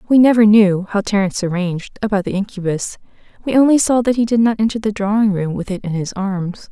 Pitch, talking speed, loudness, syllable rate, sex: 205 Hz, 225 wpm, -16 LUFS, 6.0 syllables/s, female